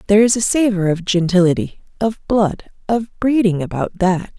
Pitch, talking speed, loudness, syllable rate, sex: 200 Hz, 165 wpm, -17 LUFS, 5.2 syllables/s, female